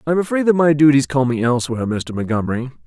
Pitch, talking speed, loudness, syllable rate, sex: 140 Hz, 230 wpm, -17 LUFS, 7.3 syllables/s, male